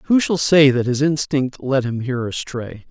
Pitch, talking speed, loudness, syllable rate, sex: 135 Hz, 205 wpm, -18 LUFS, 4.6 syllables/s, male